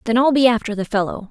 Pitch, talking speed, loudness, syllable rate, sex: 230 Hz, 275 wpm, -18 LUFS, 6.8 syllables/s, female